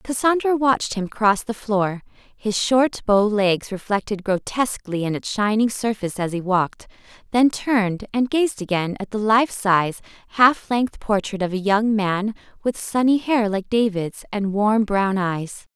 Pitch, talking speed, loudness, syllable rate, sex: 215 Hz, 165 wpm, -21 LUFS, 4.3 syllables/s, female